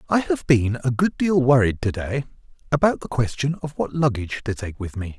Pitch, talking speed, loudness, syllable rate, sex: 130 Hz, 220 wpm, -22 LUFS, 5.4 syllables/s, male